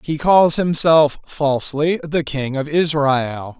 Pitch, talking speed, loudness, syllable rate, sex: 150 Hz, 135 wpm, -17 LUFS, 3.6 syllables/s, male